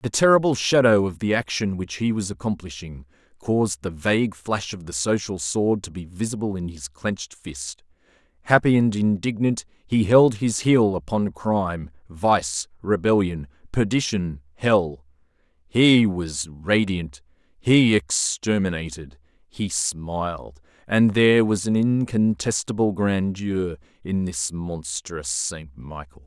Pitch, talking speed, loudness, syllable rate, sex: 95 Hz, 130 wpm, -22 LUFS, 4.1 syllables/s, male